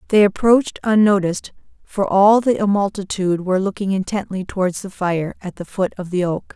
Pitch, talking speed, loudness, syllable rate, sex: 195 Hz, 175 wpm, -18 LUFS, 5.4 syllables/s, female